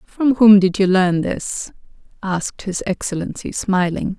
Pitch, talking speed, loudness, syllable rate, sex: 195 Hz, 145 wpm, -18 LUFS, 4.2 syllables/s, female